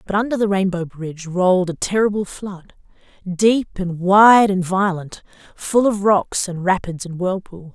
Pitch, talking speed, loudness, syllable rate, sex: 190 Hz, 165 wpm, -18 LUFS, 4.5 syllables/s, female